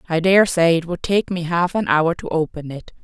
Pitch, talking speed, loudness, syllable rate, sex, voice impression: 170 Hz, 255 wpm, -18 LUFS, 5.2 syllables/s, female, feminine, adult-like, tensed, slightly hard, clear, slightly halting, intellectual, calm, slightly friendly, lively, kind